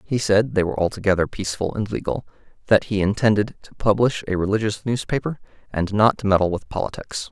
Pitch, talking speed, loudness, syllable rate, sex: 105 Hz, 180 wpm, -21 LUFS, 6.1 syllables/s, male